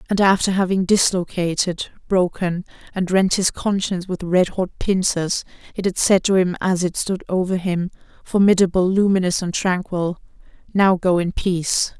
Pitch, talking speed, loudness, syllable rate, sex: 185 Hz, 155 wpm, -19 LUFS, 4.8 syllables/s, female